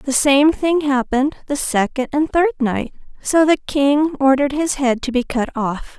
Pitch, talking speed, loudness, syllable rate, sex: 275 Hz, 190 wpm, -17 LUFS, 4.6 syllables/s, female